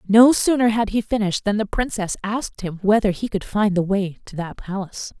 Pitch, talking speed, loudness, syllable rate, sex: 205 Hz, 220 wpm, -21 LUFS, 5.6 syllables/s, female